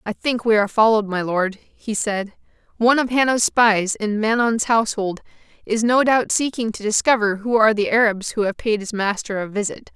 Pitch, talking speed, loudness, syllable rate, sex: 220 Hz, 200 wpm, -19 LUFS, 5.4 syllables/s, female